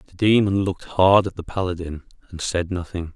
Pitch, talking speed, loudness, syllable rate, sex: 90 Hz, 190 wpm, -21 LUFS, 5.7 syllables/s, male